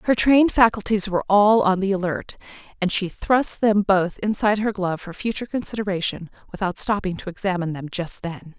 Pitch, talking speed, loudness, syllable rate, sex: 195 Hz, 180 wpm, -21 LUFS, 5.8 syllables/s, female